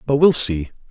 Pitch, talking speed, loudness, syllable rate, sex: 130 Hz, 200 wpm, -18 LUFS, 5.0 syllables/s, male